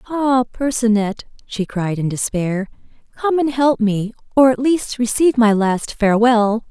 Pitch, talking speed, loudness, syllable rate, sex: 235 Hz, 150 wpm, -17 LUFS, 4.4 syllables/s, female